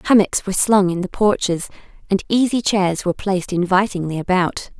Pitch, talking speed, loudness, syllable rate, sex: 190 Hz, 165 wpm, -18 LUFS, 5.7 syllables/s, female